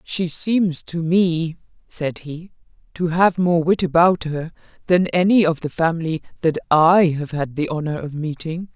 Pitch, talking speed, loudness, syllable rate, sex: 165 Hz, 170 wpm, -19 LUFS, 4.3 syllables/s, female